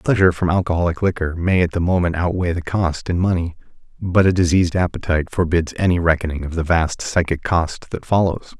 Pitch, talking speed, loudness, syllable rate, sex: 85 Hz, 195 wpm, -19 LUFS, 6.0 syllables/s, male